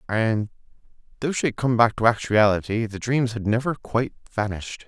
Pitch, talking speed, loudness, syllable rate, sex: 115 Hz, 170 wpm, -23 LUFS, 5.6 syllables/s, male